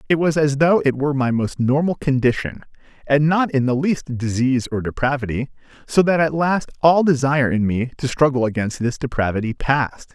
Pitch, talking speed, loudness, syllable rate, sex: 135 Hz, 190 wpm, -19 LUFS, 5.5 syllables/s, male